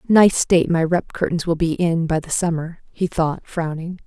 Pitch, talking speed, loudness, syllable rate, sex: 170 Hz, 205 wpm, -20 LUFS, 4.8 syllables/s, female